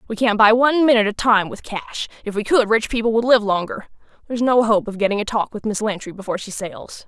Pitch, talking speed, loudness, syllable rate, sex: 215 Hz, 255 wpm, -19 LUFS, 6.3 syllables/s, female